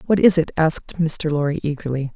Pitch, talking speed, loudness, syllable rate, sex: 155 Hz, 195 wpm, -20 LUFS, 5.8 syllables/s, female